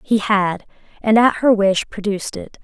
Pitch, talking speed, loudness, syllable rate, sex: 210 Hz, 180 wpm, -17 LUFS, 4.6 syllables/s, female